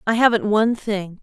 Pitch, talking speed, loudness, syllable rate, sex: 215 Hz, 195 wpm, -19 LUFS, 5.5 syllables/s, female